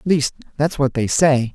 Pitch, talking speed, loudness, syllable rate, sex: 140 Hz, 235 wpm, -18 LUFS, 4.8 syllables/s, male